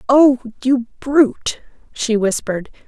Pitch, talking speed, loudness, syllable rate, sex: 245 Hz, 85 wpm, -17 LUFS, 4.2 syllables/s, female